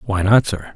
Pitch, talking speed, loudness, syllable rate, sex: 105 Hz, 240 wpm, -17 LUFS, 4.2 syllables/s, male